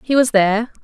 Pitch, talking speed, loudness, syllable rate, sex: 225 Hz, 215 wpm, -15 LUFS, 6.0 syllables/s, female